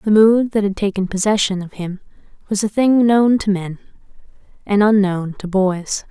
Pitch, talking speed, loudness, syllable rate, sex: 200 Hz, 175 wpm, -17 LUFS, 4.8 syllables/s, female